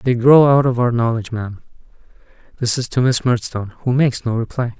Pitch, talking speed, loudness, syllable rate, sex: 120 Hz, 200 wpm, -17 LUFS, 6.2 syllables/s, male